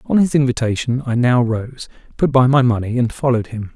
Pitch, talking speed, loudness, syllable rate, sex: 125 Hz, 210 wpm, -17 LUFS, 5.7 syllables/s, male